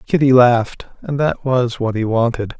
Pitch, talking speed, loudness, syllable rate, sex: 125 Hz, 185 wpm, -16 LUFS, 4.7 syllables/s, male